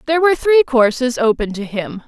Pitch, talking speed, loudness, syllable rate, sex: 255 Hz, 205 wpm, -16 LUFS, 5.8 syllables/s, female